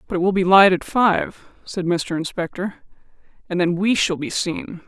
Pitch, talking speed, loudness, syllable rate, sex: 185 Hz, 195 wpm, -19 LUFS, 4.8 syllables/s, female